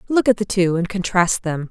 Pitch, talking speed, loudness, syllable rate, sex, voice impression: 190 Hz, 245 wpm, -19 LUFS, 5.2 syllables/s, female, very feminine, adult-like, very thin, tensed, slightly weak, bright, slightly hard, very clear, very fluent, cute, intellectual, very refreshing, sincere, calm, very friendly, very reassuring, unique, elegant, slightly wild, slightly sweet, lively, kind, slightly sharp, light